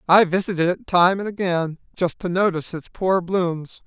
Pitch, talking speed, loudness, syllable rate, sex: 180 Hz, 185 wpm, -21 LUFS, 5.2 syllables/s, male